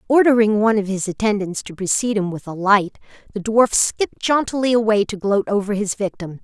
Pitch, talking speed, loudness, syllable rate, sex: 210 Hz, 195 wpm, -19 LUFS, 5.8 syllables/s, female